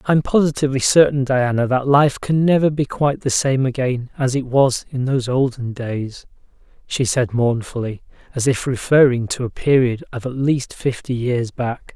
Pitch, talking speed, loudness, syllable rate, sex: 130 Hz, 175 wpm, -18 LUFS, 4.8 syllables/s, male